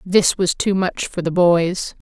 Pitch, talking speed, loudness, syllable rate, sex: 180 Hz, 205 wpm, -18 LUFS, 3.7 syllables/s, female